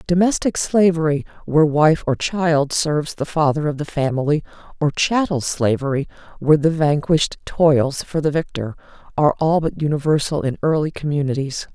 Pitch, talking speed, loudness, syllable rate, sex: 150 Hz, 150 wpm, -19 LUFS, 5.3 syllables/s, female